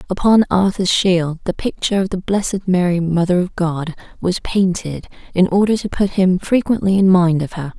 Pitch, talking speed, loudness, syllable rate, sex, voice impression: 185 Hz, 185 wpm, -17 LUFS, 5.0 syllables/s, female, feminine, slightly gender-neutral, very adult-like, slightly middle-aged, slightly thin, relaxed, slightly weak, slightly dark, soft, muffled, fluent, raspy, cool, intellectual, slightly refreshing, sincere, very calm, friendly, reassuring, slightly elegant, kind, very modest